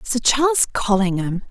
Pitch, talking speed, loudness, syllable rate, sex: 220 Hz, 120 wpm, -18 LUFS, 4.7 syllables/s, female